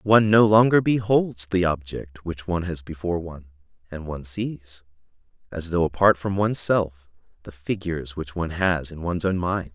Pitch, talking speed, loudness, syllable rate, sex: 90 Hz, 180 wpm, -23 LUFS, 5.3 syllables/s, male